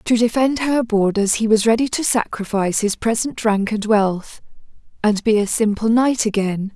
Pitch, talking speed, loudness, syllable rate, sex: 220 Hz, 180 wpm, -18 LUFS, 4.8 syllables/s, female